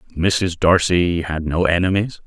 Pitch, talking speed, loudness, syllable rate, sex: 90 Hz, 130 wpm, -18 LUFS, 4.3 syllables/s, male